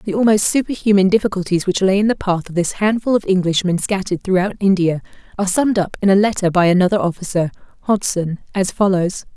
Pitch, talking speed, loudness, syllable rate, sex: 190 Hz, 185 wpm, -17 LUFS, 6.3 syllables/s, female